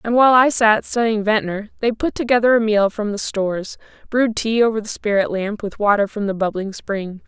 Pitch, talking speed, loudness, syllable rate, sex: 215 Hz, 215 wpm, -18 LUFS, 5.5 syllables/s, female